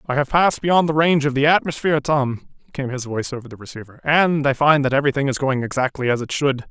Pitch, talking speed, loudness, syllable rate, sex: 140 Hz, 240 wpm, -19 LUFS, 6.6 syllables/s, male